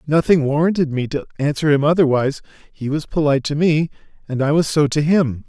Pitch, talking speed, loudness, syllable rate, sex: 150 Hz, 195 wpm, -18 LUFS, 5.8 syllables/s, male